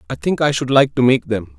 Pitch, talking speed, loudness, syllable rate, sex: 135 Hz, 305 wpm, -16 LUFS, 5.8 syllables/s, male